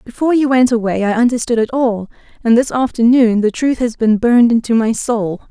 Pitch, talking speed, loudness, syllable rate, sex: 235 Hz, 205 wpm, -14 LUFS, 5.6 syllables/s, female